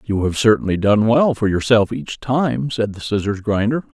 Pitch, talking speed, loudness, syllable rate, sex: 110 Hz, 195 wpm, -18 LUFS, 4.8 syllables/s, male